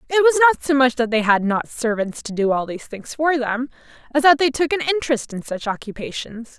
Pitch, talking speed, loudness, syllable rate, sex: 255 Hz, 235 wpm, -19 LUFS, 5.6 syllables/s, female